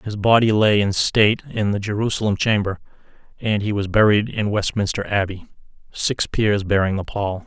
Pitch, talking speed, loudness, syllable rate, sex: 105 Hz, 170 wpm, -19 LUFS, 5.1 syllables/s, male